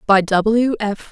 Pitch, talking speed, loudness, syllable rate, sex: 210 Hz, 160 wpm, -17 LUFS, 3.2 syllables/s, female